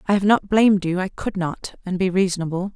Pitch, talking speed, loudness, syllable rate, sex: 190 Hz, 220 wpm, -20 LUFS, 5.9 syllables/s, female